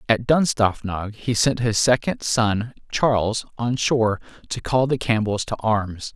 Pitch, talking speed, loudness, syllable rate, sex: 115 Hz, 155 wpm, -21 LUFS, 4.3 syllables/s, male